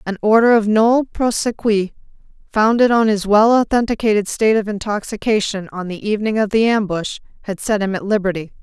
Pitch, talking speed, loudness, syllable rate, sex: 210 Hz, 165 wpm, -17 LUFS, 5.7 syllables/s, female